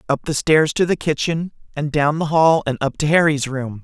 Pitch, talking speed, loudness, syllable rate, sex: 150 Hz, 235 wpm, -18 LUFS, 5.1 syllables/s, male